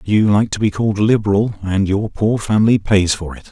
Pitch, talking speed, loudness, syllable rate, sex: 105 Hz, 205 wpm, -16 LUFS, 5.4 syllables/s, male